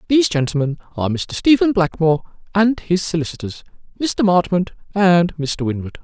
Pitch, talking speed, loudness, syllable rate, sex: 180 Hz, 140 wpm, -18 LUFS, 5.5 syllables/s, male